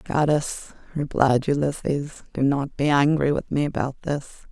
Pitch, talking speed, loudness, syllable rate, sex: 140 Hz, 145 wpm, -23 LUFS, 4.8 syllables/s, female